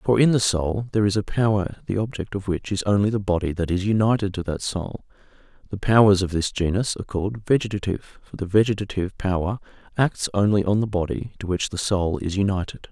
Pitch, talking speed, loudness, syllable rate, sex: 100 Hz, 210 wpm, -23 LUFS, 6.1 syllables/s, male